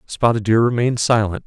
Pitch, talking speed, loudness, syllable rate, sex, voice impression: 115 Hz, 165 wpm, -17 LUFS, 5.9 syllables/s, male, masculine, adult-like, tensed, powerful, clear, slightly nasal, intellectual, slightly refreshing, calm, friendly, reassuring, wild, slightly lively, kind, modest